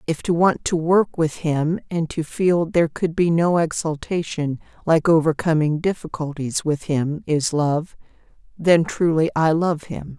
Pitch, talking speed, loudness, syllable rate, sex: 160 Hz, 160 wpm, -20 LUFS, 4.2 syllables/s, female